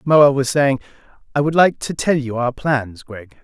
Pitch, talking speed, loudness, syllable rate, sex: 135 Hz, 210 wpm, -17 LUFS, 4.4 syllables/s, male